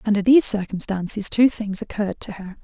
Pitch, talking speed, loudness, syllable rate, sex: 205 Hz, 185 wpm, -20 LUFS, 6.0 syllables/s, female